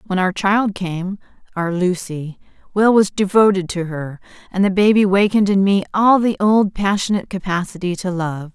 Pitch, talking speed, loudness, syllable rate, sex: 190 Hz, 155 wpm, -17 LUFS, 4.9 syllables/s, female